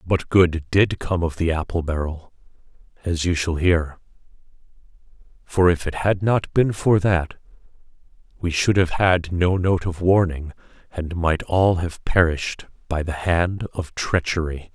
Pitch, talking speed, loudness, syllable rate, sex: 85 Hz, 155 wpm, -21 LUFS, 4.2 syllables/s, male